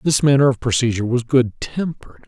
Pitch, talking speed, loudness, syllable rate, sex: 125 Hz, 185 wpm, -18 LUFS, 6.0 syllables/s, male